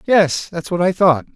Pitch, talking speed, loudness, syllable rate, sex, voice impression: 175 Hz, 220 wpm, -17 LUFS, 4.3 syllables/s, male, masculine, adult-like, tensed, powerful, bright, fluent, sincere, friendly, unique, wild, intense